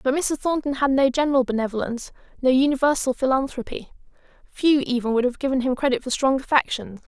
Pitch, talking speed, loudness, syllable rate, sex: 265 Hz, 160 wpm, -22 LUFS, 6.3 syllables/s, female